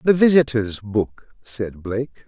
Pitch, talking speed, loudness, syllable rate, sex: 120 Hz, 130 wpm, -20 LUFS, 4.0 syllables/s, male